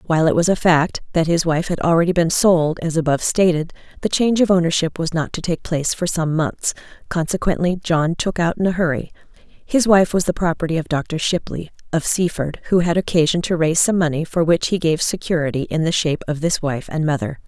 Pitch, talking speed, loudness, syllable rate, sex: 165 Hz, 220 wpm, -19 LUFS, 5.7 syllables/s, female